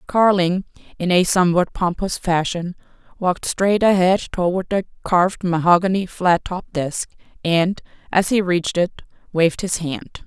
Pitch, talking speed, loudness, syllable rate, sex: 180 Hz, 140 wpm, -19 LUFS, 4.8 syllables/s, female